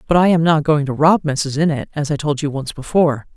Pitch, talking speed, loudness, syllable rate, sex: 150 Hz, 270 wpm, -17 LUFS, 5.9 syllables/s, female